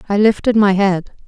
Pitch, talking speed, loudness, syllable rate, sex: 200 Hz, 190 wpm, -15 LUFS, 5.0 syllables/s, female